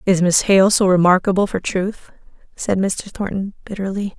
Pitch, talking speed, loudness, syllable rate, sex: 190 Hz, 160 wpm, -18 LUFS, 4.8 syllables/s, female